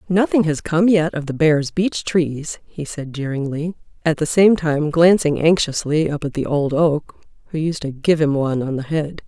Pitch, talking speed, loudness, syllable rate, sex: 155 Hz, 205 wpm, -19 LUFS, 4.7 syllables/s, female